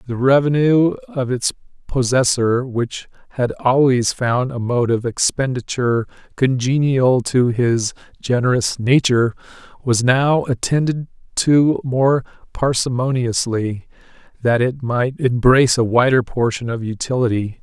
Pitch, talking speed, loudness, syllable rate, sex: 125 Hz, 110 wpm, -18 LUFS, 4.2 syllables/s, male